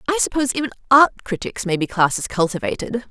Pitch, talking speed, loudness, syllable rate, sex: 225 Hz, 195 wpm, -19 LUFS, 6.8 syllables/s, female